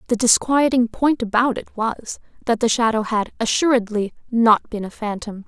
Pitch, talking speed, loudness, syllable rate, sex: 230 Hz, 165 wpm, -19 LUFS, 4.9 syllables/s, female